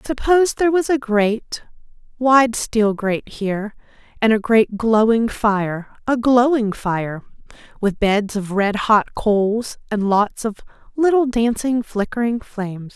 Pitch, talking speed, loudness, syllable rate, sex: 225 Hz, 130 wpm, -18 LUFS, 4.1 syllables/s, female